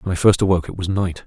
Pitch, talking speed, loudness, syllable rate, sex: 95 Hz, 330 wpm, -19 LUFS, 7.7 syllables/s, male